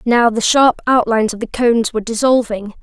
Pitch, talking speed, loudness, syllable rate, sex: 230 Hz, 190 wpm, -15 LUFS, 5.7 syllables/s, female